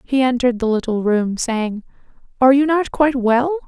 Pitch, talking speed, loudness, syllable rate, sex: 250 Hz, 180 wpm, -17 LUFS, 5.6 syllables/s, female